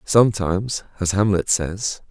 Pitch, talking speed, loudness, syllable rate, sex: 100 Hz, 115 wpm, -20 LUFS, 4.5 syllables/s, male